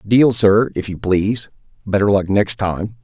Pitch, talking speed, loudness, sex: 105 Hz, 180 wpm, -17 LUFS, male